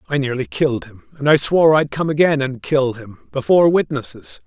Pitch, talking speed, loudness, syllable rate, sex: 140 Hz, 200 wpm, -17 LUFS, 5.7 syllables/s, male